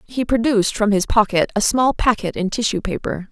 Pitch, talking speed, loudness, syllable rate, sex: 220 Hz, 200 wpm, -18 LUFS, 5.5 syllables/s, female